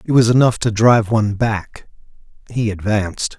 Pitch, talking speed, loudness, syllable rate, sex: 110 Hz, 160 wpm, -16 LUFS, 5.2 syllables/s, male